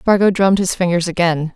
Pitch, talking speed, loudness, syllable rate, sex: 180 Hz, 195 wpm, -16 LUFS, 6.0 syllables/s, female